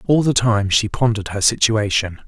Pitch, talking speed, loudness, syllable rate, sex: 110 Hz, 185 wpm, -17 LUFS, 5.3 syllables/s, male